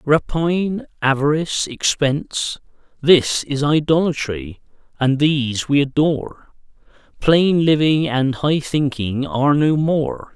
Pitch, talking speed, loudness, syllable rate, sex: 145 Hz, 105 wpm, -18 LUFS, 4.0 syllables/s, male